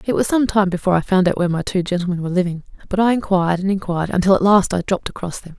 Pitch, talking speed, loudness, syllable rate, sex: 185 Hz, 280 wpm, -18 LUFS, 7.7 syllables/s, female